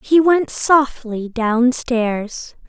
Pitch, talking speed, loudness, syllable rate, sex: 250 Hz, 90 wpm, -17 LUFS, 2.4 syllables/s, female